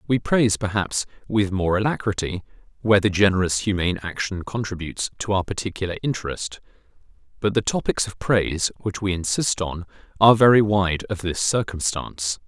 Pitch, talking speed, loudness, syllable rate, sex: 100 Hz, 150 wpm, -22 LUFS, 5.7 syllables/s, male